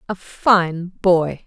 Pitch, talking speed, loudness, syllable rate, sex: 180 Hz, 125 wpm, -18 LUFS, 2.3 syllables/s, female